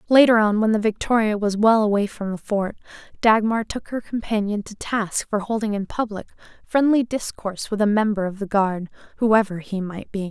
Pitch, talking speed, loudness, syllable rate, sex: 210 Hz, 190 wpm, -21 LUFS, 5.2 syllables/s, female